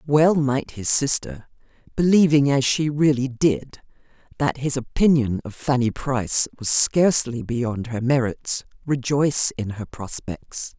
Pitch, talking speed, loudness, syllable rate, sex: 130 Hz, 135 wpm, -21 LUFS, 4.1 syllables/s, female